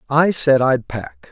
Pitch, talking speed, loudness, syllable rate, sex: 130 Hz, 180 wpm, -16 LUFS, 3.6 syllables/s, male